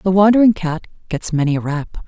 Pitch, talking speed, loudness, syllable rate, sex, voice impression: 175 Hz, 205 wpm, -17 LUFS, 5.7 syllables/s, female, feminine, adult-like, tensed, slightly hard, clear, fluent, intellectual, calm, reassuring, elegant, lively, slightly strict, slightly sharp